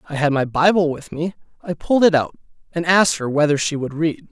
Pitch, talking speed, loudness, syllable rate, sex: 160 Hz, 235 wpm, -18 LUFS, 6.1 syllables/s, male